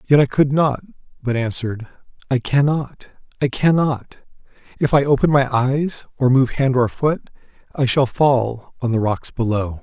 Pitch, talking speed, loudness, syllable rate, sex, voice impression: 130 Hz, 165 wpm, -19 LUFS, 4.4 syllables/s, male, masculine, middle-aged, relaxed, soft, raspy, calm, friendly, reassuring, wild, kind, modest